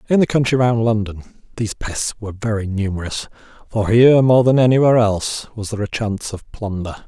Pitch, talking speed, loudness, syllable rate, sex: 110 Hz, 185 wpm, -18 LUFS, 6.0 syllables/s, male